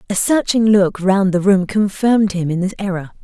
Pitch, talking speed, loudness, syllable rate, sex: 195 Hz, 205 wpm, -16 LUFS, 5.1 syllables/s, female